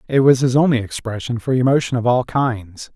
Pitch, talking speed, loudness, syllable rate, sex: 120 Hz, 205 wpm, -17 LUFS, 5.4 syllables/s, male